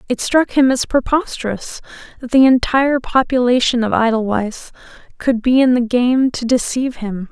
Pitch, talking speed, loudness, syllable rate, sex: 245 Hz, 155 wpm, -16 LUFS, 5.0 syllables/s, female